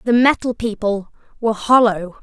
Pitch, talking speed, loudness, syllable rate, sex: 220 Hz, 135 wpm, -17 LUFS, 5.1 syllables/s, female